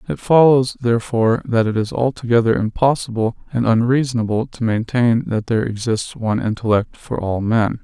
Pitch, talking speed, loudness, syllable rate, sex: 115 Hz, 155 wpm, -18 LUFS, 5.4 syllables/s, male